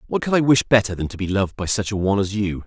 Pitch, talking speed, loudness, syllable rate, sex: 100 Hz, 340 wpm, -20 LUFS, 7.2 syllables/s, male